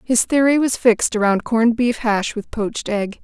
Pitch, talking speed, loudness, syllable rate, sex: 230 Hz, 205 wpm, -18 LUFS, 5.1 syllables/s, female